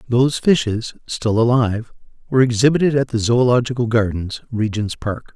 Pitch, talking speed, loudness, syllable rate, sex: 120 Hz, 110 wpm, -18 LUFS, 5.5 syllables/s, male